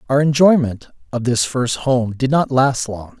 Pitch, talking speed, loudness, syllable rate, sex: 130 Hz, 190 wpm, -17 LUFS, 4.3 syllables/s, male